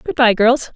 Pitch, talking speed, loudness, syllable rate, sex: 245 Hz, 240 wpm, -14 LUFS, 4.8 syllables/s, female